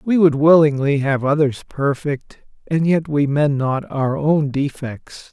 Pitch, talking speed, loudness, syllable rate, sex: 145 Hz, 160 wpm, -18 LUFS, 3.9 syllables/s, male